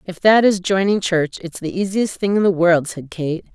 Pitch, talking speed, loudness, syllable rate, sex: 185 Hz, 235 wpm, -18 LUFS, 4.8 syllables/s, female